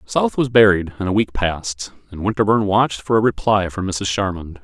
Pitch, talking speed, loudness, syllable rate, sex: 95 Hz, 205 wpm, -18 LUFS, 5.6 syllables/s, male